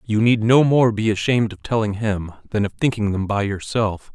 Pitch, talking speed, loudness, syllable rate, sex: 110 Hz, 215 wpm, -20 LUFS, 5.3 syllables/s, male